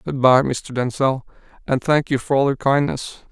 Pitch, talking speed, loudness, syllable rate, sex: 135 Hz, 200 wpm, -19 LUFS, 4.7 syllables/s, male